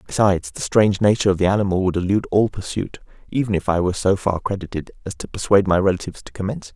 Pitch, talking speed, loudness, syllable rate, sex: 95 Hz, 230 wpm, -20 LUFS, 7.6 syllables/s, male